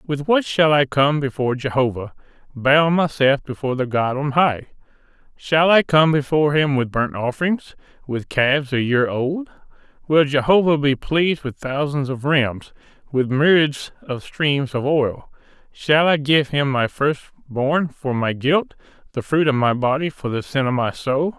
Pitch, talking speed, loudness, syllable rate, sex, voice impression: 140 Hz, 175 wpm, -19 LUFS, 4.5 syllables/s, male, masculine, slightly old, relaxed, slightly powerful, bright, muffled, halting, raspy, slightly mature, friendly, reassuring, slightly wild, kind